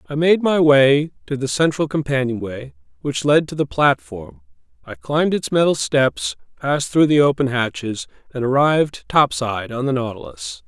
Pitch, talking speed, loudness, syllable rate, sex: 140 Hz, 165 wpm, -18 LUFS, 4.9 syllables/s, male